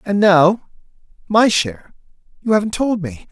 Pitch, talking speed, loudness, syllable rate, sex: 190 Hz, 110 wpm, -16 LUFS, 4.6 syllables/s, male